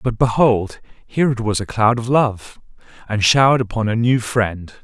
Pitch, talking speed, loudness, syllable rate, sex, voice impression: 115 Hz, 185 wpm, -17 LUFS, 4.8 syllables/s, male, very masculine, very adult-like, middle-aged, thick, tensed, powerful, slightly bright, hard, clear, slightly fluent, slightly raspy, cool, very intellectual, refreshing, very sincere, calm, mature, friendly, very reassuring, unique, elegant, wild, slightly sweet, slightly lively, kind, slightly intense, slightly modest